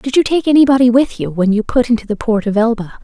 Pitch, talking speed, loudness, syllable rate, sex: 235 Hz, 275 wpm, -14 LUFS, 6.5 syllables/s, female